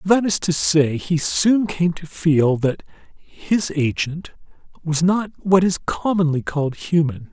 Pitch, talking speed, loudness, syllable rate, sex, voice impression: 165 Hz, 155 wpm, -19 LUFS, 3.8 syllables/s, male, masculine, adult-like, slightly middle-aged, slightly thin, relaxed, weak, slightly dark, soft, slightly clear, fluent, slightly cool, intellectual, slightly refreshing, very sincere, calm, friendly, reassuring, unique, slightly elegant, sweet, slightly lively, very kind, modest